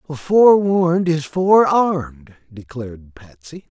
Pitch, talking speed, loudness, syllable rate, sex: 155 Hz, 80 wpm, -15 LUFS, 4.0 syllables/s, male